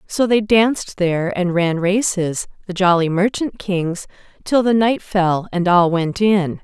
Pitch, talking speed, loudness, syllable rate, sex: 190 Hz, 170 wpm, -17 LUFS, 4.1 syllables/s, female